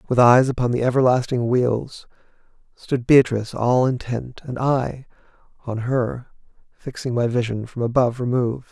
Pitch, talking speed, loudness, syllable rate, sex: 125 Hz, 140 wpm, -20 LUFS, 4.9 syllables/s, male